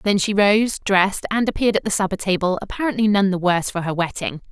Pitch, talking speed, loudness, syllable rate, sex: 200 Hz, 225 wpm, -19 LUFS, 6.5 syllables/s, female